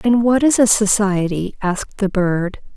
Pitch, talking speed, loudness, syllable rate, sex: 205 Hz, 175 wpm, -17 LUFS, 4.4 syllables/s, female